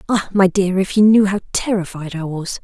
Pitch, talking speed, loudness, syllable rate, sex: 190 Hz, 230 wpm, -17 LUFS, 5.2 syllables/s, female